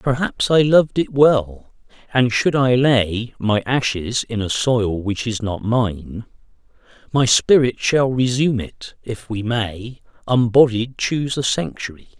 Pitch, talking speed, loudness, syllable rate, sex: 120 Hz, 145 wpm, -18 LUFS, 3.9 syllables/s, male